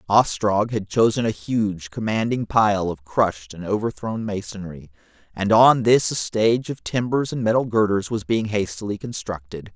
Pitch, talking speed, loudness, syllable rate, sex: 105 Hz, 160 wpm, -21 LUFS, 4.7 syllables/s, male